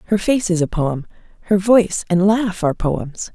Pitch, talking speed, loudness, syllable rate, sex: 190 Hz, 200 wpm, -18 LUFS, 4.9 syllables/s, female